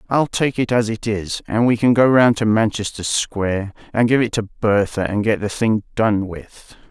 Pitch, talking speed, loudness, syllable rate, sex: 110 Hz, 215 wpm, -18 LUFS, 4.7 syllables/s, male